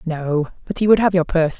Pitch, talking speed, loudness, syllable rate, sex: 175 Hz, 265 wpm, -18 LUFS, 6.0 syllables/s, female